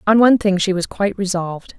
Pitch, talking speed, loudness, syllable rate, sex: 195 Hz, 235 wpm, -17 LUFS, 6.7 syllables/s, female